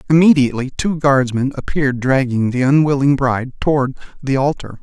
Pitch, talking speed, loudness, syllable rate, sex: 135 Hz, 135 wpm, -16 LUFS, 5.6 syllables/s, male